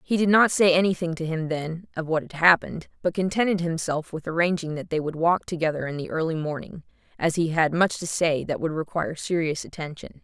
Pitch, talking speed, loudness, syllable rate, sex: 165 Hz, 215 wpm, -24 LUFS, 5.8 syllables/s, female